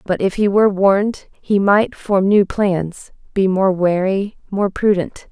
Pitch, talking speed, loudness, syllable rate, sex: 195 Hz, 170 wpm, -17 LUFS, 4.0 syllables/s, female